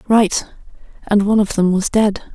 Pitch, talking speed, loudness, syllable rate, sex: 205 Hz, 180 wpm, -16 LUFS, 5.0 syllables/s, female